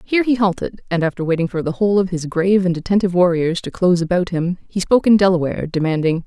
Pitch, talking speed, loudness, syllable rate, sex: 180 Hz, 230 wpm, -18 LUFS, 6.9 syllables/s, female